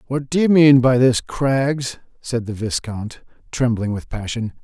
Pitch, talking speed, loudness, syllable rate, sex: 125 Hz, 170 wpm, -18 LUFS, 4.1 syllables/s, male